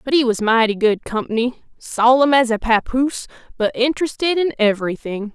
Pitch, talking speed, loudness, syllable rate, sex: 240 Hz, 155 wpm, -18 LUFS, 5.3 syllables/s, female